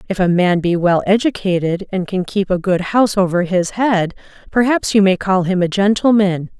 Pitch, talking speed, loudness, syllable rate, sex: 190 Hz, 200 wpm, -16 LUFS, 5.0 syllables/s, female